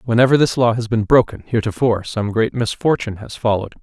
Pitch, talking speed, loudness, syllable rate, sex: 115 Hz, 190 wpm, -18 LUFS, 6.6 syllables/s, male